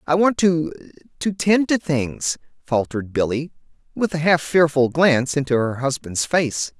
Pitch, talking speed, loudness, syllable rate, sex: 155 Hz, 150 wpm, -20 LUFS, 4.6 syllables/s, male